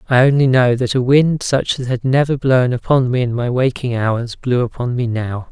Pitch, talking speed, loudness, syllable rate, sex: 125 Hz, 230 wpm, -16 LUFS, 4.9 syllables/s, male